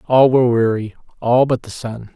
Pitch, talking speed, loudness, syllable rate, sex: 120 Hz, 195 wpm, -16 LUFS, 5.2 syllables/s, male